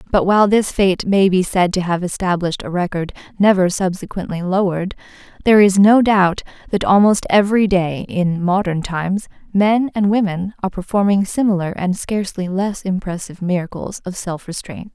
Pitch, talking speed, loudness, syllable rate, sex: 190 Hz, 160 wpm, -17 LUFS, 5.4 syllables/s, female